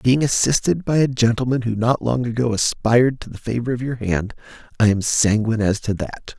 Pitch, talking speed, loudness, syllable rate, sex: 120 Hz, 205 wpm, -19 LUFS, 5.4 syllables/s, male